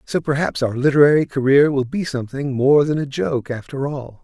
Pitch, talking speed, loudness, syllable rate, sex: 140 Hz, 200 wpm, -18 LUFS, 5.4 syllables/s, male